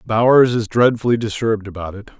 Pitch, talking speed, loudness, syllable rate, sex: 110 Hz, 165 wpm, -16 LUFS, 6.0 syllables/s, male